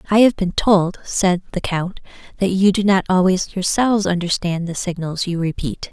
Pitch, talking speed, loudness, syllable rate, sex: 185 Hz, 180 wpm, -18 LUFS, 4.9 syllables/s, female